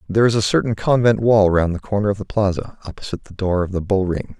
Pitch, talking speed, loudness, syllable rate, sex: 100 Hz, 260 wpm, -18 LUFS, 6.5 syllables/s, male